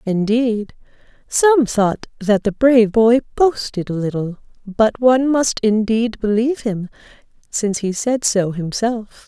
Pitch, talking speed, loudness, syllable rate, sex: 225 Hz, 135 wpm, -17 LUFS, 4.1 syllables/s, female